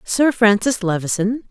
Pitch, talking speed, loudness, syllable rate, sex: 220 Hz, 120 wpm, -17 LUFS, 4.4 syllables/s, female